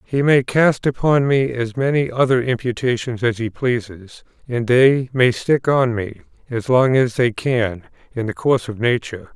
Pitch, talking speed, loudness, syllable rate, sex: 125 Hz, 180 wpm, -18 LUFS, 4.5 syllables/s, male